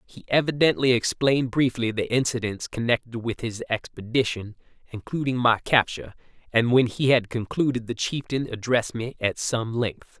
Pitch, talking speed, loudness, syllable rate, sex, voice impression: 120 Hz, 145 wpm, -24 LUFS, 5.1 syllables/s, male, masculine, adult-like, slightly refreshing, sincere